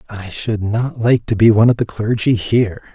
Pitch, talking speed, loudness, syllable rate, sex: 110 Hz, 225 wpm, -16 LUFS, 5.3 syllables/s, male